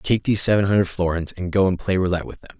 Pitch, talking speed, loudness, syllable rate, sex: 95 Hz, 275 wpm, -20 LUFS, 7.1 syllables/s, male